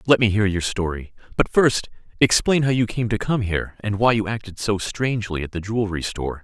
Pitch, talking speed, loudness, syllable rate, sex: 105 Hz, 225 wpm, -21 LUFS, 5.7 syllables/s, male